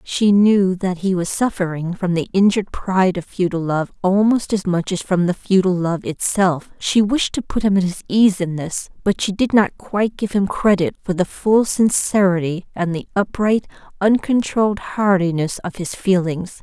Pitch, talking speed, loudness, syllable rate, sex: 190 Hz, 190 wpm, -18 LUFS, 4.8 syllables/s, female